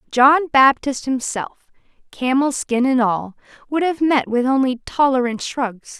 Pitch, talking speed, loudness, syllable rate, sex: 260 Hz, 140 wpm, -18 LUFS, 4.0 syllables/s, female